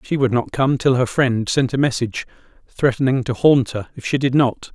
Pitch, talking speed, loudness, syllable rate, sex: 125 Hz, 230 wpm, -18 LUFS, 5.3 syllables/s, male